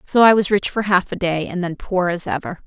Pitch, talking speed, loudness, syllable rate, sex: 185 Hz, 290 wpm, -19 LUFS, 5.5 syllables/s, female